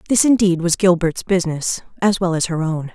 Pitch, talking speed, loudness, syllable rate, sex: 175 Hz, 205 wpm, -18 LUFS, 5.5 syllables/s, female